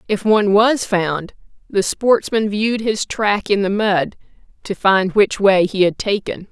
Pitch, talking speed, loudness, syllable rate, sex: 200 Hz, 175 wpm, -17 LUFS, 4.2 syllables/s, female